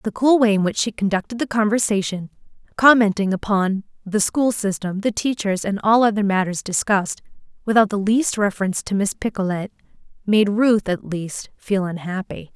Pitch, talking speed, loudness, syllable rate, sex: 205 Hz, 160 wpm, -20 LUFS, 5.2 syllables/s, female